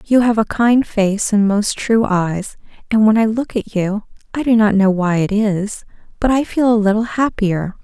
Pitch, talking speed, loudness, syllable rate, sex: 210 Hz, 205 wpm, -16 LUFS, 4.5 syllables/s, female